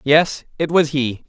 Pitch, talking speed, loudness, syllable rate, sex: 145 Hz, 190 wpm, -18 LUFS, 3.8 syllables/s, male